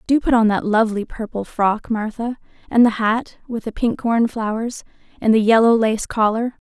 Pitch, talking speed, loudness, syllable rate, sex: 225 Hz, 180 wpm, -19 LUFS, 4.9 syllables/s, female